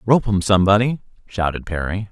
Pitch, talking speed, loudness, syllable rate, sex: 100 Hz, 140 wpm, -19 LUFS, 5.9 syllables/s, male